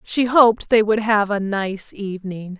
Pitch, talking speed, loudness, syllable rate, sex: 210 Hz, 185 wpm, -18 LUFS, 4.4 syllables/s, female